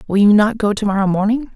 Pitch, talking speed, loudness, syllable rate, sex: 210 Hz, 230 wpm, -15 LUFS, 6.5 syllables/s, female